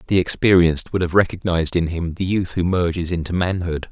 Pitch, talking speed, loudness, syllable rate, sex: 90 Hz, 200 wpm, -19 LUFS, 5.9 syllables/s, male